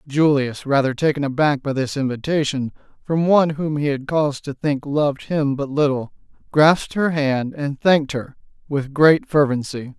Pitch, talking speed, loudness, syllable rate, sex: 145 Hz, 170 wpm, -19 LUFS, 4.9 syllables/s, male